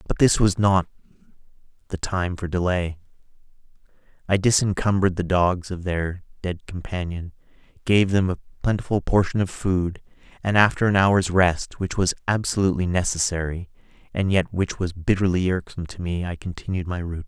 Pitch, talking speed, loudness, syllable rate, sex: 90 Hz, 155 wpm, -23 LUFS, 5.4 syllables/s, male